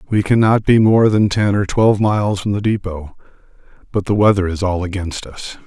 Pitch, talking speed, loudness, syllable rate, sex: 100 Hz, 200 wpm, -16 LUFS, 5.4 syllables/s, male